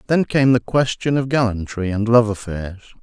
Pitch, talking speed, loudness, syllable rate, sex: 115 Hz, 180 wpm, -18 LUFS, 5.0 syllables/s, male